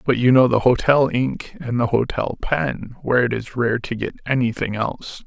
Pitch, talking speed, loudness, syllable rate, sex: 120 Hz, 205 wpm, -20 LUFS, 4.9 syllables/s, male